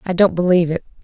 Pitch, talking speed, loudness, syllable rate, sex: 175 Hz, 235 wpm, -16 LUFS, 7.8 syllables/s, female